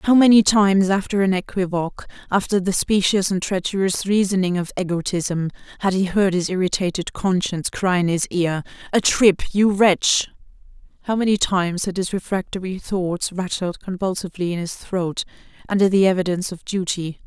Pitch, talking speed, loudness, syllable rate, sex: 185 Hz, 155 wpm, -20 LUFS, 5.3 syllables/s, female